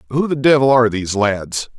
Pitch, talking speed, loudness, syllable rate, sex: 120 Hz, 200 wpm, -16 LUFS, 6.1 syllables/s, male